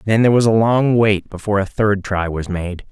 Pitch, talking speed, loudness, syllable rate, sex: 105 Hz, 245 wpm, -17 LUFS, 5.5 syllables/s, male